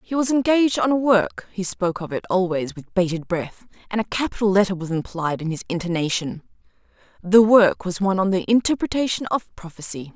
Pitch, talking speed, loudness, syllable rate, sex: 195 Hz, 185 wpm, -21 LUFS, 5.7 syllables/s, female